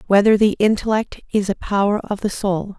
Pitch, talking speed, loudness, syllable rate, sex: 205 Hz, 195 wpm, -19 LUFS, 5.2 syllables/s, female